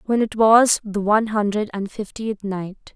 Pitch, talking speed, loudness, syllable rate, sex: 210 Hz, 185 wpm, -20 LUFS, 4.4 syllables/s, female